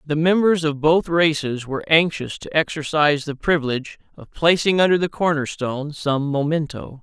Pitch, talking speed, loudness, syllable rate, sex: 155 Hz, 160 wpm, -20 LUFS, 5.2 syllables/s, male